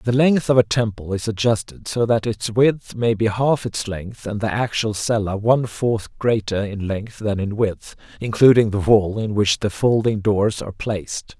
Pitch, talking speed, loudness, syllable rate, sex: 110 Hz, 200 wpm, -20 LUFS, 4.5 syllables/s, male